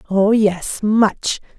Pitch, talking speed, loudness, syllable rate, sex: 205 Hz, 115 wpm, -17 LUFS, 2.5 syllables/s, female